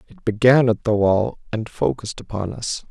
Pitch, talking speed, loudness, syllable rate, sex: 115 Hz, 185 wpm, -20 LUFS, 5.0 syllables/s, male